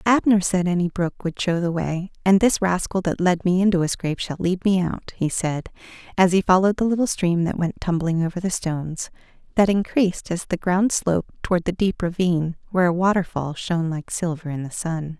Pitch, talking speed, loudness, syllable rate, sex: 180 Hz, 215 wpm, -22 LUFS, 5.6 syllables/s, female